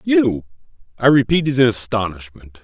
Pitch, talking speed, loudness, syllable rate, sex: 120 Hz, 115 wpm, -17 LUFS, 5.0 syllables/s, male